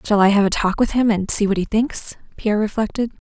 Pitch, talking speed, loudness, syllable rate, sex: 210 Hz, 255 wpm, -19 LUFS, 5.9 syllables/s, female